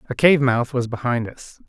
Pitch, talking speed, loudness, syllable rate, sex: 125 Hz, 215 wpm, -19 LUFS, 4.9 syllables/s, male